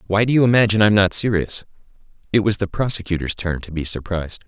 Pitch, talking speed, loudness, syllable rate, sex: 100 Hz, 200 wpm, -19 LUFS, 6.7 syllables/s, male